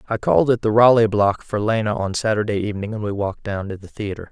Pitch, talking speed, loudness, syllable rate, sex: 105 Hz, 250 wpm, -19 LUFS, 6.6 syllables/s, male